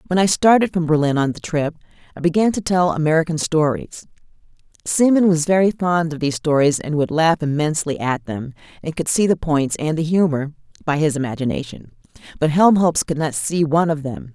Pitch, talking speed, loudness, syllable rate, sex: 160 Hz, 190 wpm, -18 LUFS, 5.6 syllables/s, female